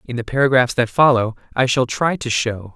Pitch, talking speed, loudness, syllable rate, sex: 125 Hz, 220 wpm, -18 LUFS, 5.3 syllables/s, male